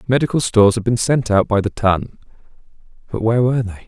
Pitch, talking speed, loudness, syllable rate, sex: 115 Hz, 200 wpm, -17 LUFS, 6.5 syllables/s, male